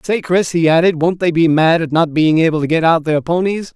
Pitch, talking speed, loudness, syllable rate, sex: 165 Hz, 270 wpm, -14 LUFS, 5.5 syllables/s, male